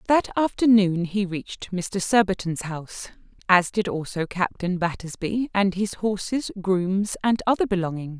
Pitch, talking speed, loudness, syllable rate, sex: 195 Hz, 140 wpm, -23 LUFS, 4.5 syllables/s, female